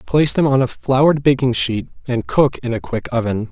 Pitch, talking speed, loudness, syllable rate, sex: 130 Hz, 220 wpm, -17 LUFS, 5.4 syllables/s, male